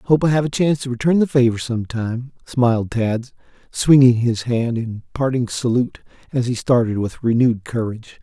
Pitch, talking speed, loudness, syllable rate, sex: 125 Hz, 180 wpm, -19 LUFS, 5.2 syllables/s, male